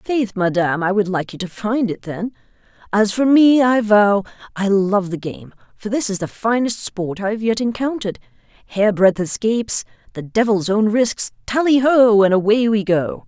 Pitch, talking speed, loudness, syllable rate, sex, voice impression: 210 Hz, 175 wpm, -17 LUFS, 4.8 syllables/s, female, feminine, adult-like, slightly powerful, intellectual, slightly elegant